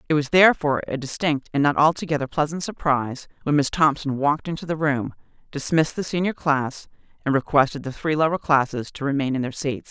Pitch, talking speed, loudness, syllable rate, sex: 145 Hz, 195 wpm, -22 LUFS, 6.0 syllables/s, female